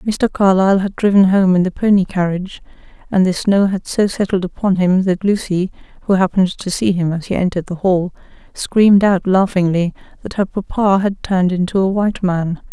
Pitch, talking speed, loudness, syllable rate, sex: 190 Hz, 195 wpm, -16 LUFS, 5.5 syllables/s, female